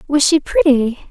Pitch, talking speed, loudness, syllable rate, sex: 295 Hz, 165 wpm, -14 LUFS, 4.3 syllables/s, female